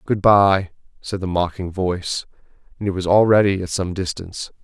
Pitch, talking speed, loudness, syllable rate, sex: 95 Hz, 170 wpm, -19 LUFS, 5.3 syllables/s, male